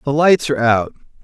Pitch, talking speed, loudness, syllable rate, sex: 135 Hz, 195 wpm, -15 LUFS, 5.9 syllables/s, male